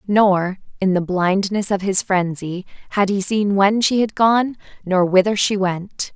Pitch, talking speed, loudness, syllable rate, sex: 195 Hz, 175 wpm, -18 LUFS, 4.0 syllables/s, female